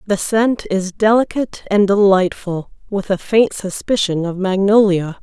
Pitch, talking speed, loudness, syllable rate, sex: 200 Hz, 140 wpm, -16 LUFS, 4.5 syllables/s, female